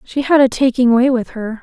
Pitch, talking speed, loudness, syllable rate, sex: 250 Hz, 260 wpm, -14 LUFS, 5.2 syllables/s, female